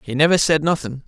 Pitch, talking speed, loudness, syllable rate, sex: 150 Hz, 225 wpm, -18 LUFS, 6.2 syllables/s, male